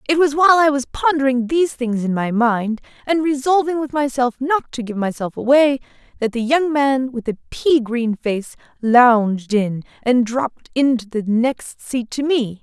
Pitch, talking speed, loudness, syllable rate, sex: 255 Hz, 185 wpm, -18 LUFS, 4.6 syllables/s, female